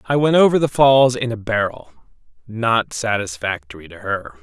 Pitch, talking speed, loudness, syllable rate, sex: 110 Hz, 150 wpm, -18 LUFS, 4.6 syllables/s, male